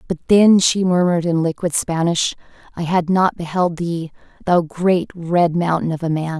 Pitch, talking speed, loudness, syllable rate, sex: 170 Hz, 180 wpm, -18 LUFS, 4.5 syllables/s, female